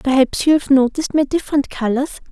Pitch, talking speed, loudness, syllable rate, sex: 275 Hz, 155 wpm, -17 LUFS, 6.5 syllables/s, female